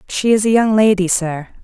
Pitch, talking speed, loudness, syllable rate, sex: 200 Hz, 220 wpm, -15 LUFS, 5.2 syllables/s, female